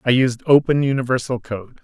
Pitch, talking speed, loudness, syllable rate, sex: 130 Hz, 165 wpm, -18 LUFS, 5.4 syllables/s, male